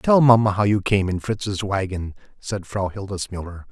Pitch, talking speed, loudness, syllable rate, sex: 100 Hz, 180 wpm, -21 LUFS, 4.7 syllables/s, male